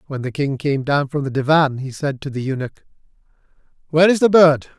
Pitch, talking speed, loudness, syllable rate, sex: 145 Hz, 215 wpm, -18 LUFS, 5.8 syllables/s, male